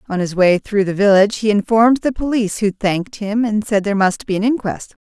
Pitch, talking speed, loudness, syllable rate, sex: 210 Hz, 235 wpm, -16 LUFS, 6.0 syllables/s, female